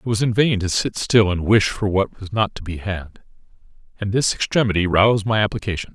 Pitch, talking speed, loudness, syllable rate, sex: 100 Hz, 220 wpm, -19 LUFS, 5.6 syllables/s, male